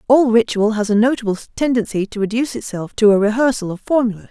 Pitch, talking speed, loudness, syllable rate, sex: 225 Hz, 195 wpm, -17 LUFS, 6.7 syllables/s, female